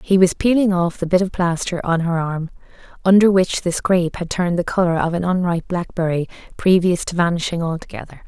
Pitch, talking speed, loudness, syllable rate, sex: 175 Hz, 195 wpm, -18 LUFS, 5.9 syllables/s, female